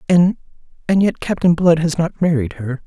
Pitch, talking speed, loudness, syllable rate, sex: 165 Hz, 190 wpm, -17 LUFS, 5.1 syllables/s, male